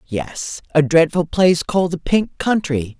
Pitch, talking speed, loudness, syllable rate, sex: 165 Hz, 160 wpm, -18 LUFS, 4.3 syllables/s, female